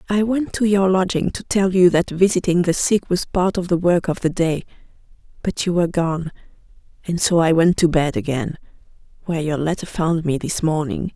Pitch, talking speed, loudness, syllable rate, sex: 175 Hz, 205 wpm, -19 LUFS, 5.2 syllables/s, female